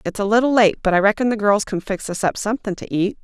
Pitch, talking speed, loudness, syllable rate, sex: 205 Hz, 295 wpm, -19 LUFS, 6.5 syllables/s, female